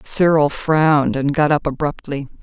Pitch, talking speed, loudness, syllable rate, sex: 150 Hz, 150 wpm, -17 LUFS, 4.5 syllables/s, female